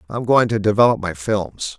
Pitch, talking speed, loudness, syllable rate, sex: 105 Hz, 200 wpm, -18 LUFS, 5.6 syllables/s, male